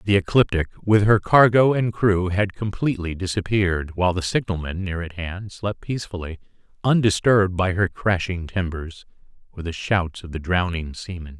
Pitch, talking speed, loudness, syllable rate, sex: 95 Hz, 160 wpm, -22 LUFS, 5.1 syllables/s, male